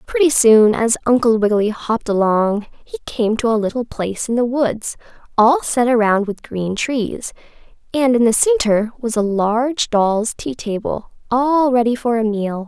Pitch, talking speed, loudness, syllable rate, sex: 230 Hz, 175 wpm, -17 LUFS, 4.5 syllables/s, female